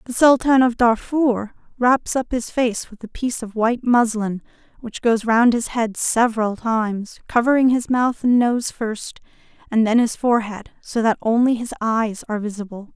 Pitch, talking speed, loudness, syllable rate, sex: 230 Hz, 175 wpm, -19 LUFS, 4.8 syllables/s, female